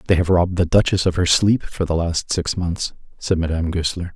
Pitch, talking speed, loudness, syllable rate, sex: 85 Hz, 230 wpm, -19 LUFS, 5.6 syllables/s, male